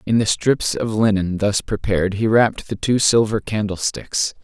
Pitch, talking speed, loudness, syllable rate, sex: 105 Hz, 175 wpm, -19 LUFS, 4.7 syllables/s, male